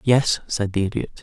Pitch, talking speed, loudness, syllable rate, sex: 110 Hz, 195 wpm, -22 LUFS, 4.6 syllables/s, male